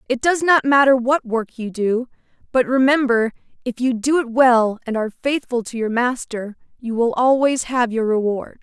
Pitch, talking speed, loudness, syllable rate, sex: 245 Hz, 190 wpm, -18 LUFS, 4.8 syllables/s, female